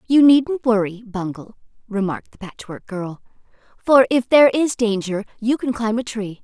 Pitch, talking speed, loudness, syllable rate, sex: 225 Hz, 170 wpm, -19 LUFS, 4.9 syllables/s, female